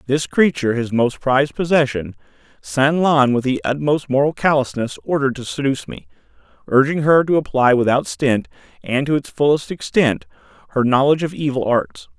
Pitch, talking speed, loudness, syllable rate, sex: 135 Hz, 160 wpm, -18 LUFS, 5.4 syllables/s, male